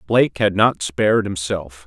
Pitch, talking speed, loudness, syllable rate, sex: 95 Hz, 160 wpm, -19 LUFS, 4.6 syllables/s, male